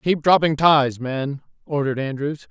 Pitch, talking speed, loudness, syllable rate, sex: 145 Hz, 145 wpm, -20 LUFS, 4.6 syllables/s, male